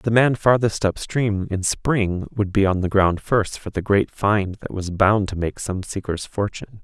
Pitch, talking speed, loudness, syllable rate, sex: 100 Hz, 210 wpm, -21 LUFS, 4.3 syllables/s, male